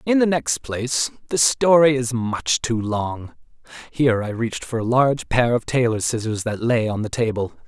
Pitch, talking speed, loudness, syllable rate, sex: 120 Hz, 195 wpm, -20 LUFS, 4.9 syllables/s, male